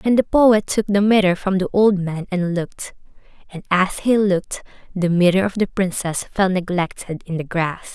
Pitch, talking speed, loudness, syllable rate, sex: 190 Hz, 195 wpm, -19 LUFS, 5.0 syllables/s, female